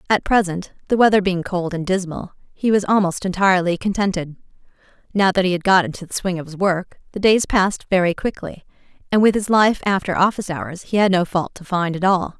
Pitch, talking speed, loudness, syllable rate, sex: 185 Hz, 215 wpm, -19 LUFS, 5.8 syllables/s, female